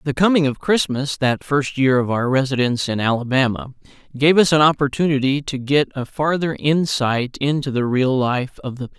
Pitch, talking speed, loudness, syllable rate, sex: 140 Hz, 185 wpm, -19 LUFS, 5.3 syllables/s, male